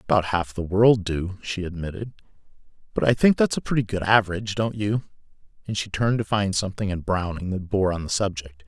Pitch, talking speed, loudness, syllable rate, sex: 100 Hz, 210 wpm, -23 LUFS, 5.8 syllables/s, male